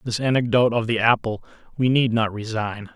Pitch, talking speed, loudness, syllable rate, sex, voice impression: 115 Hz, 185 wpm, -21 LUFS, 5.6 syllables/s, male, very masculine, very adult-like, slightly old, thick, tensed, very powerful, slightly dark, slightly hard, slightly muffled, fluent, slightly raspy, cool, intellectual, sincere, very calm, very mature, friendly, reassuring, unique, slightly elegant, wild, slightly sweet, slightly lively, slightly strict, slightly modest